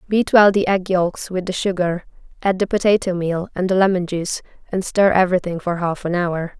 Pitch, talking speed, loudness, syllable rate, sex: 185 Hz, 210 wpm, -19 LUFS, 5.4 syllables/s, female